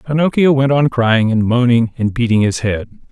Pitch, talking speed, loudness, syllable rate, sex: 120 Hz, 195 wpm, -14 LUFS, 5.1 syllables/s, male